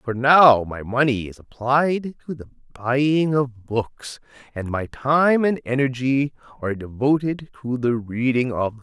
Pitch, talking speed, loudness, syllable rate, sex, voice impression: 130 Hz, 155 wpm, -21 LUFS, 4.0 syllables/s, male, very masculine, very adult-like, slightly thick, cool, slightly refreshing, slightly reassuring, slightly wild